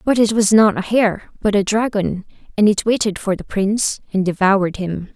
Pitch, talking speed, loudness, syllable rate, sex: 205 Hz, 210 wpm, -17 LUFS, 5.1 syllables/s, female